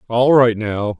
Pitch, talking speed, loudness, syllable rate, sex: 115 Hz, 180 wpm, -15 LUFS, 3.7 syllables/s, male